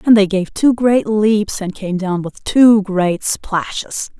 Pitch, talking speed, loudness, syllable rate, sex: 205 Hz, 185 wpm, -15 LUFS, 3.5 syllables/s, female